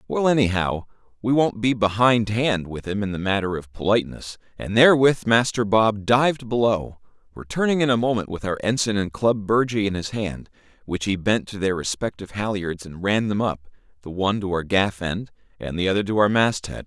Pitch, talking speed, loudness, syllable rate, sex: 105 Hz, 195 wpm, -22 LUFS, 5.5 syllables/s, male